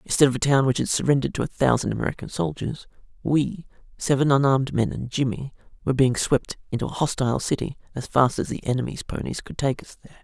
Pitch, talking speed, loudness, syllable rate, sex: 135 Hz, 205 wpm, -24 LUFS, 6.6 syllables/s, male